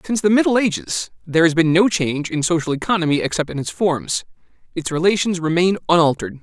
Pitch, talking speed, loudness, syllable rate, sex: 170 Hz, 185 wpm, -18 LUFS, 6.5 syllables/s, male